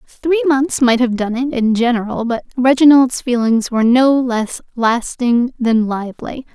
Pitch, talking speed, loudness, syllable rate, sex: 245 Hz, 155 wpm, -15 LUFS, 4.3 syllables/s, female